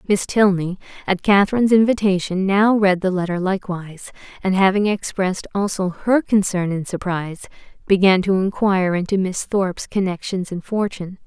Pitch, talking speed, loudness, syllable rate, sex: 190 Hz, 145 wpm, -19 LUFS, 5.4 syllables/s, female